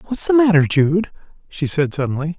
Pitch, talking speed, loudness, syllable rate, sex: 170 Hz, 175 wpm, -17 LUFS, 5.5 syllables/s, male